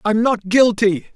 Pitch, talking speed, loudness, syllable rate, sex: 215 Hz, 155 wpm, -16 LUFS, 4.0 syllables/s, male